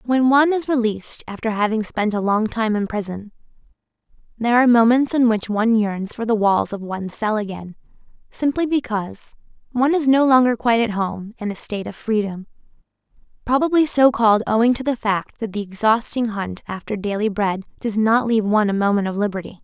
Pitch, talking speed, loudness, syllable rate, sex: 220 Hz, 185 wpm, -19 LUFS, 5.8 syllables/s, female